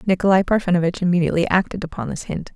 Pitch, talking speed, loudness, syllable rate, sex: 180 Hz, 165 wpm, -20 LUFS, 7.5 syllables/s, female